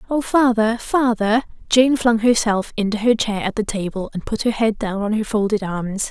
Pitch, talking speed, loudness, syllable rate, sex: 220 Hz, 205 wpm, -19 LUFS, 4.9 syllables/s, female